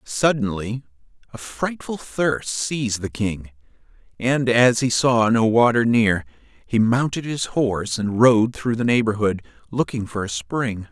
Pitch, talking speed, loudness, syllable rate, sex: 115 Hz, 150 wpm, -20 LUFS, 4.1 syllables/s, male